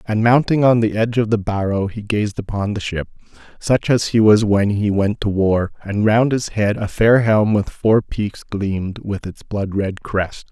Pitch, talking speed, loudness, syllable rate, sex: 105 Hz, 215 wpm, -18 LUFS, 4.4 syllables/s, male